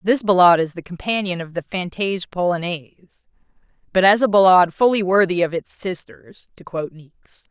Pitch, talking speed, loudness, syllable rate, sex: 180 Hz, 170 wpm, -18 LUFS, 5.4 syllables/s, female